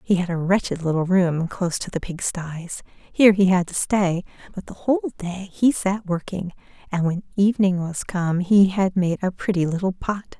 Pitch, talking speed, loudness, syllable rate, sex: 185 Hz, 195 wpm, -22 LUFS, 5.1 syllables/s, female